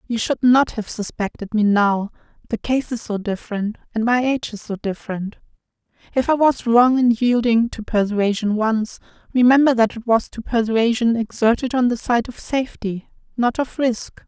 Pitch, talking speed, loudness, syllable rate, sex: 230 Hz, 175 wpm, -19 LUFS, 5.0 syllables/s, female